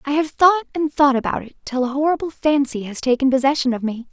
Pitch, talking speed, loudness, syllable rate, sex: 275 Hz, 235 wpm, -19 LUFS, 6.2 syllables/s, female